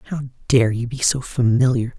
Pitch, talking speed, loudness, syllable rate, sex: 125 Hz, 180 wpm, -19 LUFS, 5.4 syllables/s, male